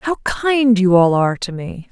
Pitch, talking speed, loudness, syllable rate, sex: 210 Hz, 220 wpm, -15 LUFS, 4.3 syllables/s, female